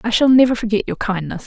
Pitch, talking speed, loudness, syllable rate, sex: 220 Hz, 245 wpm, -16 LUFS, 6.8 syllables/s, female